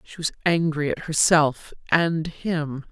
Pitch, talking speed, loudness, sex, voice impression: 155 Hz, 145 wpm, -22 LUFS, female, gender-neutral, adult-like, slightly soft, slightly muffled, calm, slightly unique